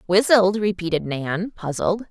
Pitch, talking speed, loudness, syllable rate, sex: 190 Hz, 115 wpm, -21 LUFS, 4.2 syllables/s, female